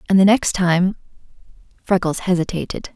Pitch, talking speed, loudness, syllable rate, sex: 185 Hz, 120 wpm, -18 LUFS, 5.9 syllables/s, female